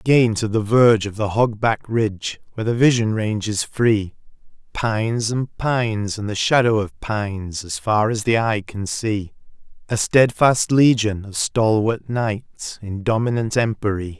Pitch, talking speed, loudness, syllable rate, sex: 110 Hz, 160 wpm, -20 LUFS, 4.2 syllables/s, male